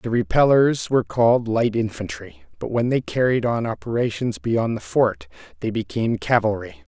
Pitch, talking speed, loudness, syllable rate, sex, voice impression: 115 Hz, 155 wpm, -21 LUFS, 5.1 syllables/s, male, masculine, middle-aged, thick, slightly weak, slightly muffled, slightly halting, mature, friendly, reassuring, wild, lively, kind